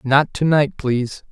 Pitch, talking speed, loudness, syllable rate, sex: 140 Hz, 135 wpm, -18 LUFS, 4.2 syllables/s, male